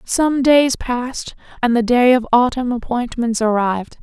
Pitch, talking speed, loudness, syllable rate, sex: 245 Hz, 150 wpm, -16 LUFS, 4.4 syllables/s, female